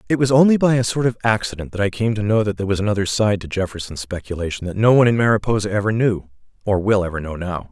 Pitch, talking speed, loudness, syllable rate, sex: 105 Hz, 255 wpm, -19 LUFS, 7.0 syllables/s, male